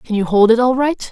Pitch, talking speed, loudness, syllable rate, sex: 235 Hz, 325 wpm, -14 LUFS, 5.6 syllables/s, female